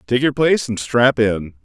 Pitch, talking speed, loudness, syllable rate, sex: 115 Hz, 220 wpm, -17 LUFS, 4.9 syllables/s, male